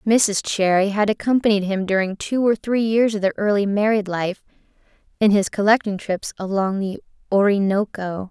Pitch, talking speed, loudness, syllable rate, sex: 205 Hz, 160 wpm, -20 LUFS, 5.0 syllables/s, female